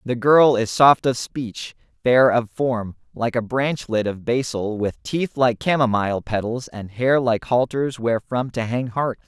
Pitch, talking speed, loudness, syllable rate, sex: 120 Hz, 175 wpm, -20 LUFS, 4.1 syllables/s, male